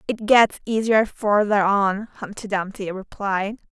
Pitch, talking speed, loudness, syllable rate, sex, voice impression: 205 Hz, 130 wpm, -21 LUFS, 4.0 syllables/s, female, very feminine, slightly young, very thin, tensed, powerful, very bright, soft, clear, slightly halting, raspy, cute, intellectual, refreshing, very sincere, calm, friendly, reassuring, very unique, slightly elegant, wild, sweet, lively, slightly kind, sharp